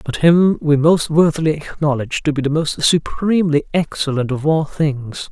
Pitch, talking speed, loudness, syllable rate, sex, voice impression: 150 Hz, 170 wpm, -17 LUFS, 4.9 syllables/s, male, masculine, adult-like, tensed, bright, soft, raspy, cool, calm, reassuring, slightly wild, lively, kind